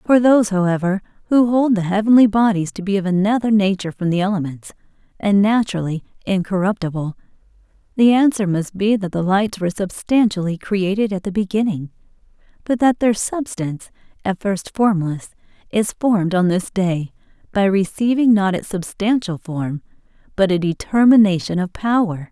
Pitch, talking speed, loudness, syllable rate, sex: 200 Hz, 150 wpm, -18 LUFS, 5.3 syllables/s, female